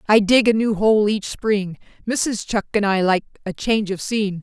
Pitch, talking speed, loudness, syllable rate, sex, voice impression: 210 Hz, 215 wpm, -19 LUFS, 4.9 syllables/s, female, feminine, very adult-like, fluent, intellectual, slightly sharp